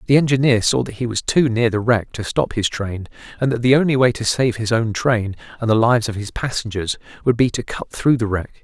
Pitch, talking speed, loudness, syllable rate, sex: 115 Hz, 255 wpm, -19 LUFS, 5.6 syllables/s, male